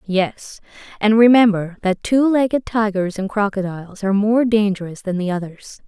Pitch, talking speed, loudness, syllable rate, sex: 205 Hz, 155 wpm, -18 LUFS, 4.9 syllables/s, female